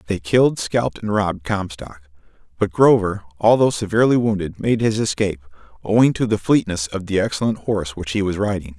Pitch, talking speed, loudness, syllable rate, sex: 100 Hz, 180 wpm, -19 LUFS, 5.8 syllables/s, male